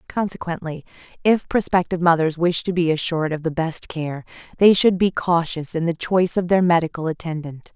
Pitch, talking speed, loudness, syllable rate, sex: 170 Hz, 180 wpm, -20 LUFS, 5.6 syllables/s, female